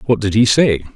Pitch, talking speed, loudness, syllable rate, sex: 110 Hz, 250 wpm, -14 LUFS, 5.1 syllables/s, male